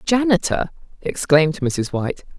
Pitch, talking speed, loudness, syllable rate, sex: 170 Hz, 100 wpm, -20 LUFS, 4.8 syllables/s, female